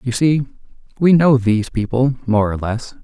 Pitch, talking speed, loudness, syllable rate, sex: 125 Hz, 180 wpm, -16 LUFS, 4.8 syllables/s, male